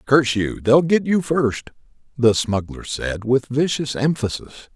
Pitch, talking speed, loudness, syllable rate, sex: 130 Hz, 150 wpm, -20 LUFS, 4.4 syllables/s, male